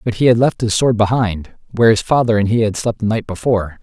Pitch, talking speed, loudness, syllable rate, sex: 110 Hz, 265 wpm, -16 LUFS, 6.2 syllables/s, male